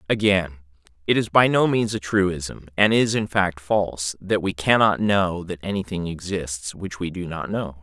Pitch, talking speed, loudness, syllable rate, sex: 95 Hz, 190 wpm, -22 LUFS, 4.4 syllables/s, male